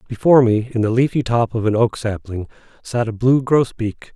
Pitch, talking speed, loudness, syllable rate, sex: 115 Hz, 200 wpm, -18 LUFS, 5.3 syllables/s, male